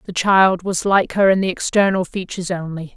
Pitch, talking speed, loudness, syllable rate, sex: 185 Hz, 205 wpm, -17 LUFS, 5.3 syllables/s, female